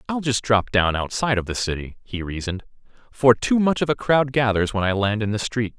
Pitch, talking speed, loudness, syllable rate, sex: 115 Hz, 240 wpm, -21 LUFS, 5.7 syllables/s, male